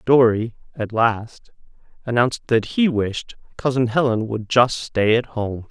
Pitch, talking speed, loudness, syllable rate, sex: 120 Hz, 145 wpm, -20 LUFS, 4.1 syllables/s, male